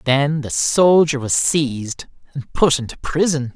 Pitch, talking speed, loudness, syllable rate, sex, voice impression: 140 Hz, 150 wpm, -17 LUFS, 4.1 syllables/s, male, masculine, adult-like, tensed, powerful, bright, clear, fluent, cool, intellectual, friendly, wild, lively, slightly kind